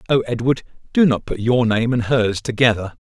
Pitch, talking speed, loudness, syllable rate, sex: 120 Hz, 200 wpm, -18 LUFS, 5.2 syllables/s, male